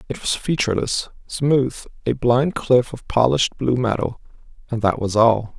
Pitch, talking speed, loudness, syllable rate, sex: 120 Hz, 150 wpm, -20 LUFS, 4.6 syllables/s, male